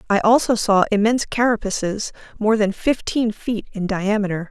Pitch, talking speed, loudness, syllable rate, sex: 215 Hz, 145 wpm, -19 LUFS, 5.1 syllables/s, female